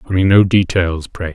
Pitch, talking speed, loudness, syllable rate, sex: 90 Hz, 180 wpm, -14 LUFS, 4.8 syllables/s, male